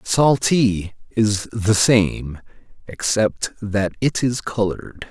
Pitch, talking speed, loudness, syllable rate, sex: 105 Hz, 105 wpm, -19 LUFS, 3.1 syllables/s, male